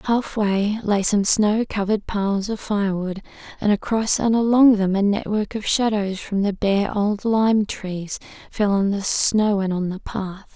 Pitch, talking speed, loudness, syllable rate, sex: 205 Hz, 175 wpm, -20 LUFS, 4.3 syllables/s, female